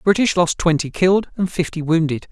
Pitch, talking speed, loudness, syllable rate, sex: 170 Hz, 210 wpm, -18 LUFS, 6.1 syllables/s, male